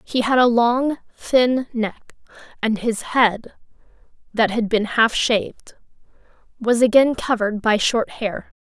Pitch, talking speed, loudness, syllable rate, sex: 230 Hz, 140 wpm, -19 LUFS, 3.9 syllables/s, female